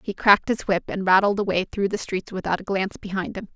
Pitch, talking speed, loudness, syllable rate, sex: 195 Hz, 255 wpm, -23 LUFS, 6.3 syllables/s, female